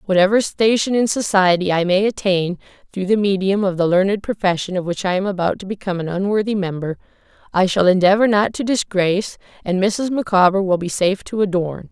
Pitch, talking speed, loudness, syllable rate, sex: 195 Hz, 190 wpm, -18 LUFS, 5.8 syllables/s, female